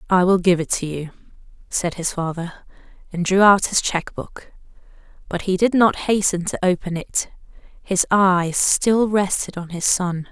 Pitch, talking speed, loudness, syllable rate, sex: 185 Hz, 175 wpm, -19 LUFS, 4.3 syllables/s, female